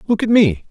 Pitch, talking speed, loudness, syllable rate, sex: 195 Hz, 255 wpm, -14 LUFS, 5.8 syllables/s, male